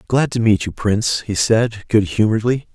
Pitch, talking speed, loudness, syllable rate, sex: 110 Hz, 195 wpm, -17 LUFS, 5.1 syllables/s, male